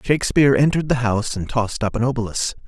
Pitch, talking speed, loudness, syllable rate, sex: 125 Hz, 200 wpm, -19 LUFS, 7.3 syllables/s, male